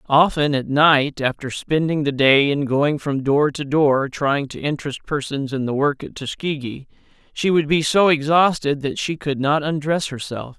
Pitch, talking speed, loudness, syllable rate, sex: 145 Hz, 185 wpm, -19 LUFS, 4.5 syllables/s, male